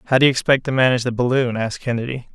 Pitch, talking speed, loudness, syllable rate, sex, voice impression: 125 Hz, 255 wpm, -19 LUFS, 8.1 syllables/s, male, masculine, adult-like, slightly thick, slightly fluent, slightly calm, unique